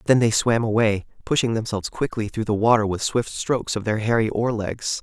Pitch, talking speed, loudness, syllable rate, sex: 110 Hz, 215 wpm, -22 LUFS, 5.5 syllables/s, male